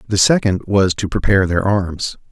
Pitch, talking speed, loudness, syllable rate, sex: 100 Hz, 180 wpm, -16 LUFS, 5.0 syllables/s, male